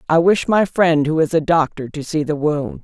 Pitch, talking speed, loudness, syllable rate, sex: 160 Hz, 255 wpm, -17 LUFS, 4.9 syllables/s, female